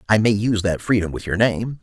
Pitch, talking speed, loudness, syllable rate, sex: 105 Hz, 265 wpm, -20 LUFS, 6.1 syllables/s, male